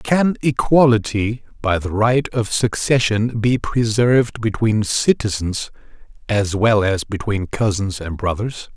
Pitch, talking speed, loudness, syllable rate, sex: 110 Hz, 125 wpm, -18 LUFS, 3.9 syllables/s, male